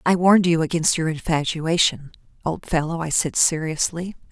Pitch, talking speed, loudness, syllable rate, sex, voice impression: 165 Hz, 155 wpm, -21 LUFS, 5.1 syllables/s, female, feminine, adult-like, tensed, powerful, bright, soft, fluent, intellectual, calm, friendly, reassuring, elegant, lively, kind